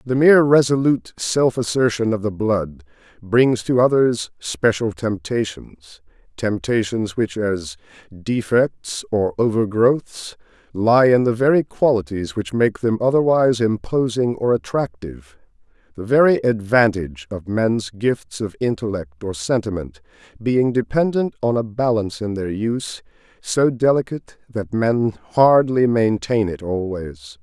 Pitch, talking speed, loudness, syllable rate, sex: 110 Hz, 125 wpm, -19 LUFS, 4.2 syllables/s, male